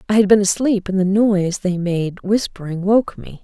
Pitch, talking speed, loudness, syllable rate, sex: 195 Hz, 210 wpm, -17 LUFS, 4.9 syllables/s, female